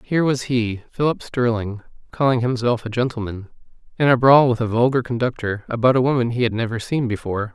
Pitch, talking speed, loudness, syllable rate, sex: 120 Hz, 190 wpm, -20 LUFS, 5.9 syllables/s, male